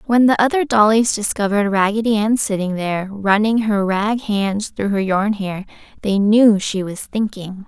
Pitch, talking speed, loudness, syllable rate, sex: 210 Hz, 170 wpm, -17 LUFS, 4.7 syllables/s, female